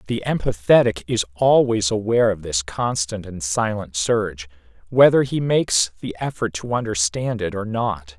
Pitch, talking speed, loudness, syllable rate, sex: 105 Hz, 155 wpm, -20 LUFS, 4.8 syllables/s, male